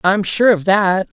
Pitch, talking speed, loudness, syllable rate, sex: 195 Hz, 205 wpm, -15 LUFS, 3.9 syllables/s, female